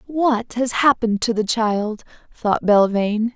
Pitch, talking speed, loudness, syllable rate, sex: 225 Hz, 145 wpm, -19 LUFS, 4.4 syllables/s, female